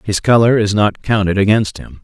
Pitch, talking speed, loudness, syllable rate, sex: 100 Hz, 205 wpm, -14 LUFS, 5.2 syllables/s, male